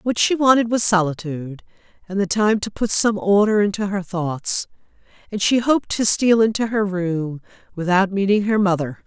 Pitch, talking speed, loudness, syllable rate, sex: 200 Hz, 180 wpm, -19 LUFS, 5.0 syllables/s, female